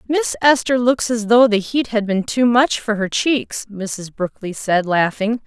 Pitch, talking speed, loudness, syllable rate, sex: 225 Hz, 200 wpm, -18 LUFS, 4.1 syllables/s, female